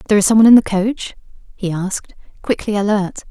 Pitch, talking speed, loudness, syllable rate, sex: 205 Hz, 180 wpm, -15 LUFS, 6.9 syllables/s, female